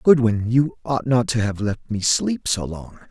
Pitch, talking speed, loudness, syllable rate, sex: 115 Hz, 215 wpm, -21 LUFS, 4.2 syllables/s, male